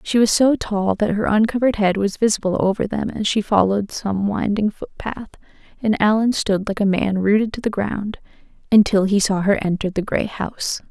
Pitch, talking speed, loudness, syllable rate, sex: 205 Hz, 200 wpm, -19 LUFS, 5.3 syllables/s, female